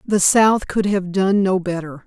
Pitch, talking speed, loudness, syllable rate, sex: 190 Hz, 205 wpm, -17 LUFS, 4.1 syllables/s, female